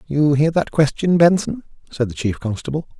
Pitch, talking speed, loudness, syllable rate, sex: 145 Hz, 180 wpm, -18 LUFS, 5.2 syllables/s, male